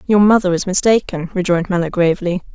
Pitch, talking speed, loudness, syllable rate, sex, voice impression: 185 Hz, 165 wpm, -16 LUFS, 6.6 syllables/s, female, feminine, adult-like, slightly relaxed, powerful, soft, clear, intellectual, calm, friendly, reassuring, kind, modest